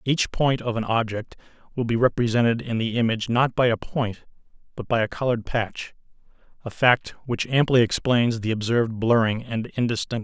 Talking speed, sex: 175 wpm, male